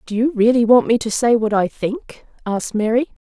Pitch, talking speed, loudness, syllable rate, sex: 230 Hz, 220 wpm, -17 LUFS, 5.4 syllables/s, female